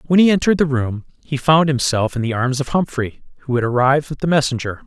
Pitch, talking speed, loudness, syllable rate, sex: 135 Hz, 235 wpm, -18 LUFS, 6.4 syllables/s, male